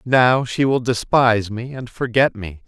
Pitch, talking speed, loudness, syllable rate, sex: 120 Hz, 180 wpm, -18 LUFS, 4.3 syllables/s, male